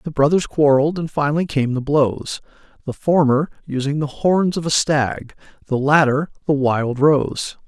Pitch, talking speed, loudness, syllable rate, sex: 145 Hz, 165 wpm, -18 LUFS, 4.6 syllables/s, male